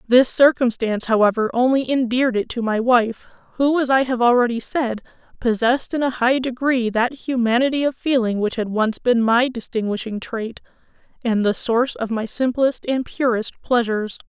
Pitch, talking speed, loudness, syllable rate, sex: 240 Hz, 170 wpm, -19 LUFS, 5.1 syllables/s, female